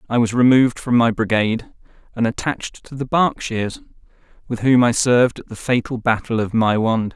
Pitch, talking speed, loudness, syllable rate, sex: 120 Hz, 175 wpm, -18 LUFS, 5.6 syllables/s, male